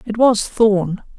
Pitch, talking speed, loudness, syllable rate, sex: 210 Hz, 150 wpm, -16 LUFS, 3.1 syllables/s, female